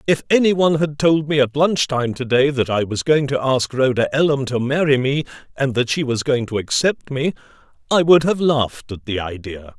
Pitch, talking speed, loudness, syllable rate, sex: 135 Hz, 225 wpm, -18 LUFS, 5.2 syllables/s, male